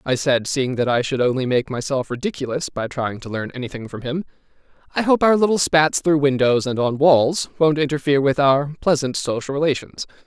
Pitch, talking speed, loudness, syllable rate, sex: 140 Hz, 200 wpm, -20 LUFS, 5.5 syllables/s, male